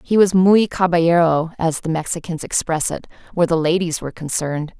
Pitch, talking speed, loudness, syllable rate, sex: 170 Hz, 175 wpm, -18 LUFS, 5.7 syllables/s, female